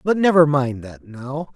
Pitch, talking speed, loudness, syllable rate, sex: 150 Hz, 195 wpm, -18 LUFS, 4.3 syllables/s, male